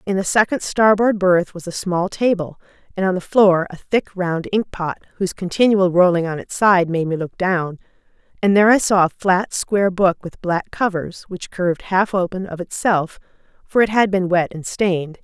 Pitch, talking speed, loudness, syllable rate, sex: 185 Hz, 205 wpm, -18 LUFS, 4.9 syllables/s, female